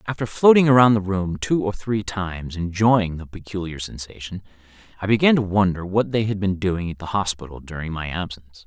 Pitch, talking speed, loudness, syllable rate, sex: 95 Hz, 195 wpm, -21 LUFS, 5.5 syllables/s, male